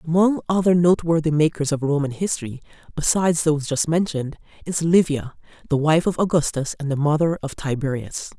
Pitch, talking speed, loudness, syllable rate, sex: 155 Hz, 155 wpm, -21 LUFS, 5.9 syllables/s, female